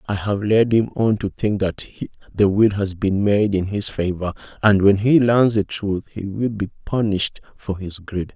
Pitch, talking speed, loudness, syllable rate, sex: 100 Hz, 210 wpm, -20 LUFS, 4.4 syllables/s, male